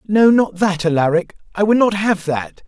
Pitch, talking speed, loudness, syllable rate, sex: 190 Hz, 200 wpm, -16 LUFS, 4.8 syllables/s, male